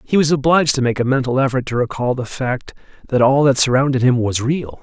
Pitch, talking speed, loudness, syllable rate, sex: 130 Hz, 235 wpm, -17 LUFS, 6.0 syllables/s, male